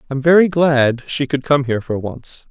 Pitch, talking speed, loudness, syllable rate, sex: 140 Hz, 215 wpm, -16 LUFS, 4.8 syllables/s, male